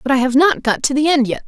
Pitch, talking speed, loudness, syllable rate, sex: 270 Hz, 365 wpm, -15 LUFS, 6.3 syllables/s, female